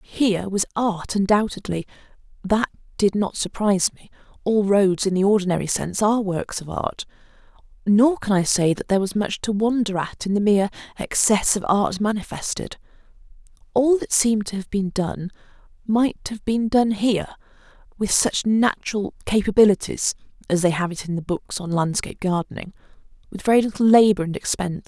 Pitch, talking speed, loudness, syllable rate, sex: 200 Hz, 155 wpm, -21 LUFS, 4.8 syllables/s, female